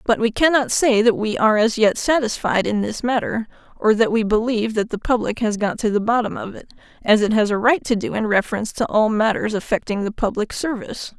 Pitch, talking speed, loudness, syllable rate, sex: 220 Hz, 225 wpm, -19 LUFS, 5.9 syllables/s, female